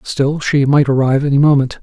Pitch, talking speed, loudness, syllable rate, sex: 140 Hz, 195 wpm, -13 LUFS, 5.8 syllables/s, male